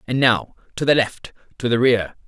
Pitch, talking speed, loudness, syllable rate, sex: 120 Hz, 185 wpm, -19 LUFS, 4.9 syllables/s, male